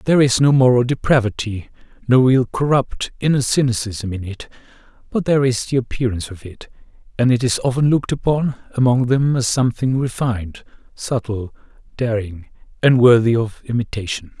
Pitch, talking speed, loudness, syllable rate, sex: 120 Hz, 150 wpm, -18 LUFS, 5.4 syllables/s, male